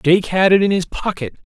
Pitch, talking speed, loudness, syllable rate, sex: 180 Hz, 240 wpm, -16 LUFS, 5.1 syllables/s, male